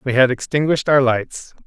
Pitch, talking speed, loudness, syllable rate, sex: 135 Hz, 180 wpm, -17 LUFS, 5.4 syllables/s, male